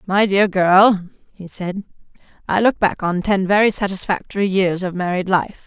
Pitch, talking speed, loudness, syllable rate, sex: 190 Hz, 170 wpm, -17 LUFS, 4.8 syllables/s, female